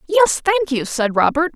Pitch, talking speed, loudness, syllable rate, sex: 310 Hz, 195 wpm, -17 LUFS, 4.5 syllables/s, female